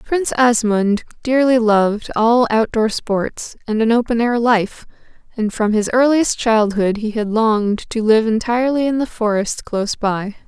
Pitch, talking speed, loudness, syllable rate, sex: 225 Hz, 160 wpm, -17 LUFS, 4.5 syllables/s, female